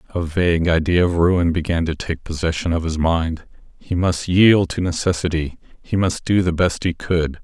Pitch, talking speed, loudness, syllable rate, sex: 85 Hz, 195 wpm, -19 LUFS, 4.9 syllables/s, male